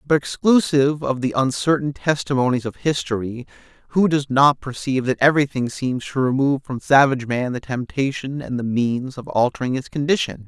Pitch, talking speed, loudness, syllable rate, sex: 135 Hz, 165 wpm, -20 LUFS, 5.5 syllables/s, male